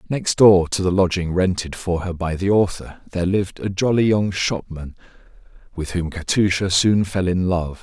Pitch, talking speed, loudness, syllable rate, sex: 95 Hz, 185 wpm, -19 LUFS, 4.9 syllables/s, male